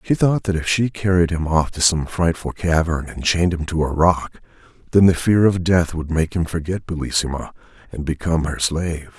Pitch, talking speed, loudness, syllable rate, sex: 85 Hz, 210 wpm, -19 LUFS, 5.3 syllables/s, male